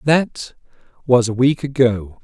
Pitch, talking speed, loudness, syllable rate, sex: 130 Hz, 135 wpm, -17 LUFS, 3.9 syllables/s, male